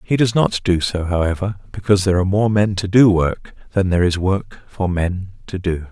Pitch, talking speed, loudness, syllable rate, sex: 95 Hz, 225 wpm, -18 LUFS, 5.5 syllables/s, male